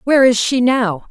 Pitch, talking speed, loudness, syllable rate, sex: 240 Hz, 215 wpm, -14 LUFS, 5.2 syllables/s, female